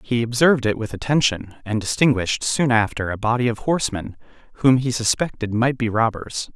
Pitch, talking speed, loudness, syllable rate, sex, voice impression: 115 Hz, 175 wpm, -20 LUFS, 5.6 syllables/s, male, very masculine, very adult-like, middle-aged, very thick, very tensed, very powerful, slightly bright, hard, slightly muffled, fluent, slightly raspy, very cool, very intellectual, very sincere, very calm, very mature, friendly, reassuring, slightly unique, very elegant, slightly wild, slightly lively, kind, slightly modest